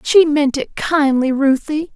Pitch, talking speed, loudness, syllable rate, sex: 290 Hz, 155 wpm, -16 LUFS, 3.8 syllables/s, female